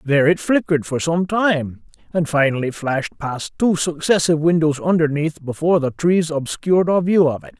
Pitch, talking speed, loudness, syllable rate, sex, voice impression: 160 Hz, 175 wpm, -18 LUFS, 5.3 syllables/s, male, very masculine, slightly old, thick, slightly muffled, slightly cool, wild